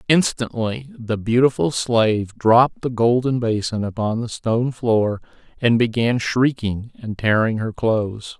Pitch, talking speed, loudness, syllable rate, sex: 115 Hz, 135 wpm, -20 LUFS, 4.3 syllables/s, male